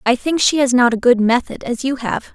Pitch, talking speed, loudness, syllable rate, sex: 250 Hz, 280 wpm, -16 LUFS, 5.4 syllables/s, female